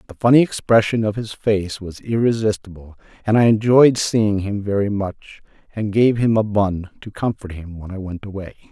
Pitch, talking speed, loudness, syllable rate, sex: 105 Hz, 185 wpm, -18 LUFS, 5.0 syllables/s, male